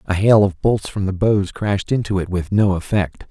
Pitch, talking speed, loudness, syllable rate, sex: 95 Hz, 235 wpm, -18 LUFS, 5.1 syllables/s, male